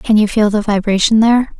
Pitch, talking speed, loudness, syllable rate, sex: 215 Hz, 225 wpm, -13 LUFS, 5.8 syllables/s, female